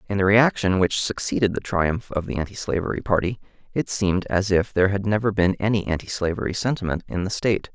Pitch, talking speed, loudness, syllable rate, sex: 95 Hz, 195 wpm, -23 LUFS, 6.1 syllables/s, male